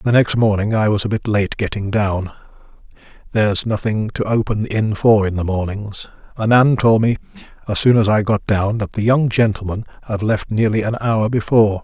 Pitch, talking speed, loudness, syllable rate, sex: 105 Hz, 195 wpm, -17 LUFS, 5.2 syllables/s, male